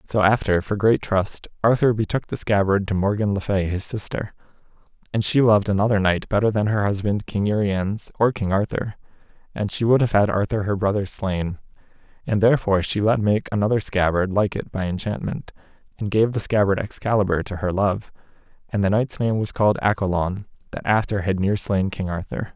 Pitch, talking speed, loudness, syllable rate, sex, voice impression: 100 Hz, 190 wpm, -21 LUFS, 5.5 syllables/s, male, masculine, adult-like, tensed, slightly bright, slightly muffled, cool, intellectual, sincere, friendly, wild, lively, kind